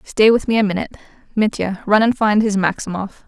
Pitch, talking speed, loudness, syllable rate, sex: 210 Hz, 200 wpm, -17 LUFS, 6.0 syllables/s, female